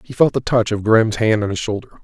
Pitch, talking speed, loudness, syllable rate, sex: 110 Hz, 295 wpm, -17 LUFS, 6.6 syllables/s, male